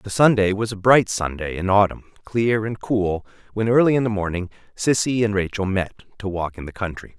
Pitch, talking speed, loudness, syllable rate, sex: 105 Hz, 210 wpm, -21 LUFS, 5.3 syllables/s, male